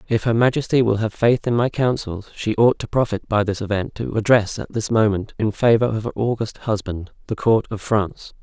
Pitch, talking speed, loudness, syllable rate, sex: 110 Hz, 220 wpm, -20 LUFS, 5.4 syllables/s, male